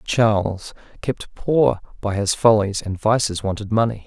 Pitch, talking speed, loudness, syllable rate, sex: 105 Hz, 150 wpm, -20 LUFS, 4.3 syllables/s, male